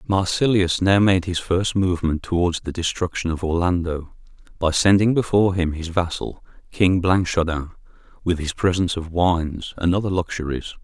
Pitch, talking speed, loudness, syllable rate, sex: 90 Hz, 150 wpm, -21 LUFS, 5.0 syllables/s, male